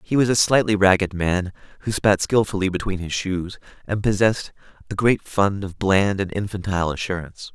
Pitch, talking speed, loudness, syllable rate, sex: 100 Hz, 175 wpm, -21 LUFS, 5.4 syllables/s, male